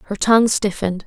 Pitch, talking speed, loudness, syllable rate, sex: 205 Hz, 170 wpm, -17 LUFS, 6.9 syllables/s, female